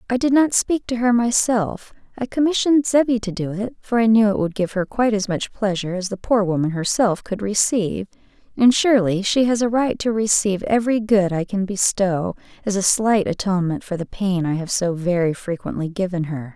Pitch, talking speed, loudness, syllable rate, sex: 205 Hz, 205 wpm, -20 LUFS, 5.5 syllables/s, female